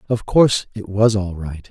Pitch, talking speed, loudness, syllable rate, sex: 100 Hz, 210 wpm, -18 LUFS, 4.8 syllables/s, male